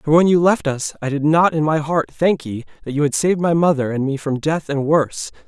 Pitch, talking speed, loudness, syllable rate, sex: 150 Hz, 275 wpm, -18 LUFS, 5.6 syllables/s, male